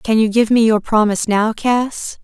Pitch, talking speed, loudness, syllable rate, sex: 220 Hz, 215 wpm, -15 LUFS, 4.8 syllables/s, female